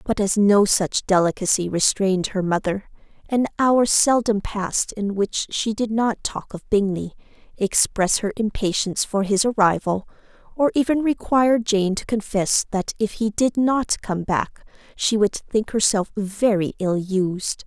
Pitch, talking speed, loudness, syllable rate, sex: 210 Hz, 155 wpm, -21 LUFS, 4.3 syllables/s, female